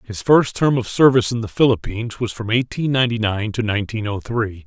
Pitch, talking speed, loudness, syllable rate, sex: 115 Hz, 220 wpm, -19 LUFS, 6.0 syllables/s, male